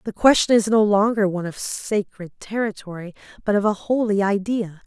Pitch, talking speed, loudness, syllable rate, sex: 205 Hz, 160 wpm, -20 LUFS, 5.2 syllables/s, female